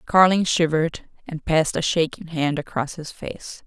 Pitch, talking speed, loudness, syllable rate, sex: 160 Hz, 165 wpm, -22 LUFS, 4.8 syllables/s, female